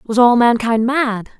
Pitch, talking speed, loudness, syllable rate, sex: 235 Hz, 170 wpm, -14 LUFS, 4.0 syllables/s, female